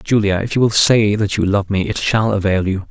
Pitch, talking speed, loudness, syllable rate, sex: 105 Hz, 270 wpm, -16 LUFS, 5.2 syllables/s, male